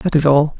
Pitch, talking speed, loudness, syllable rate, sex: 150 Hz, 305 wpm, -14 LUFS, 5.5 syllables/s, female